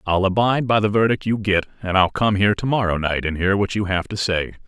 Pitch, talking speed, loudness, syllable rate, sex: 100 Hz, 270 wpm, -20 LUFS, 6.1 syllables/s, male